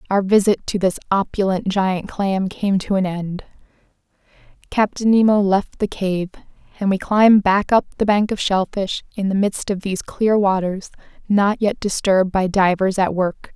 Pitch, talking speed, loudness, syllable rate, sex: 195 Hz, 175 wpm, -19 LUFS, 4.7 syllables/s, female